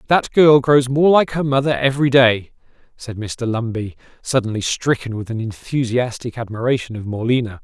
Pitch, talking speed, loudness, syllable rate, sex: 125 Hz, 155 wpm, -18 LUFS, 5.2 syllables/s, male